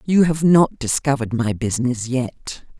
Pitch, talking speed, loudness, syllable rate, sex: 130 Hz, 150 wpm, -19 LUFS, 4.6 syllables/s, female